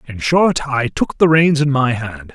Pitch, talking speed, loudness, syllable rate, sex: 135 Hz, 230 wpm, -15 LUFS, 4.2 syllables/s, male